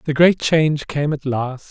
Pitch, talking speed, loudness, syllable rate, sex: 145 Hz, 210 wpm, -18 LUFS, 4.5 syllables/s, male